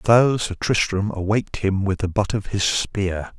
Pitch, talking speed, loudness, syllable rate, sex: 100 Hz, 195 wpm, -21 LUFS, 4.5 syllables/s, male